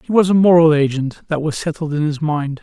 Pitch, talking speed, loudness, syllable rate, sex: 155 Hz, 230 wpm, -16 LUFS, 5.7 syllables/s, male